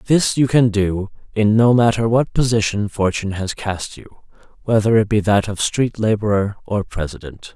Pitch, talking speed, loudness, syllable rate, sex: 105 Hz, 175 wpm, -18 LUFS, 4.7 syllables/s, male